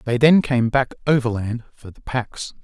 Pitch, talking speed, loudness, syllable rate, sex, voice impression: 125 Hz, 180 wpm, -19 LUFS, 4.5 syllables/s, male, very masculine, very adult-like, middle-aged, thick, tensed, powerful, slightly dark, slightly hard, slightly muffled, fluent, slightly raspy, very cool, very intellectual, slightly refreshing, very sincere, very calm, very mature, very friendly, very reassuring, unique, elegant, wild, sweet, lively, kind, slightly intense